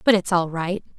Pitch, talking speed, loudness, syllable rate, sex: 180 Hz, 245 wpm, -22 LUFS, 5.2 syllables/s, female